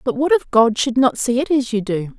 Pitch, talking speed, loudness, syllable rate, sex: 235 Hz, 300 wpm, -17 LUFS, 5.3 syllables/s, female